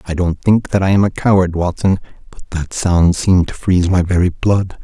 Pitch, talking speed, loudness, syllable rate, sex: 90 Hz, 225 wpm, -15 LUFS, 5.4 syllables/s, male